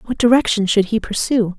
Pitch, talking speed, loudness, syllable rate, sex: 220 Hz, 190 wpm, -16 LUFS, 5.2 syllables/s, female